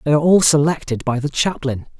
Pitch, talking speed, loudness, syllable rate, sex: 145 Hz, 210 wpm, -17 LUFS, 6.2 syllables/s, male